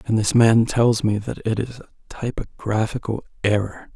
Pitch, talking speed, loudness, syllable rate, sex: 110 Hz, 165 wpm, -21 LUFS, 4.7 syllables/s, male